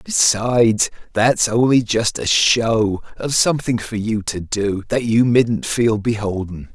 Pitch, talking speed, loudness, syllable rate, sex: 110 Hz, 150 wpm, -17 LUFS, 3.9 syllables/s, male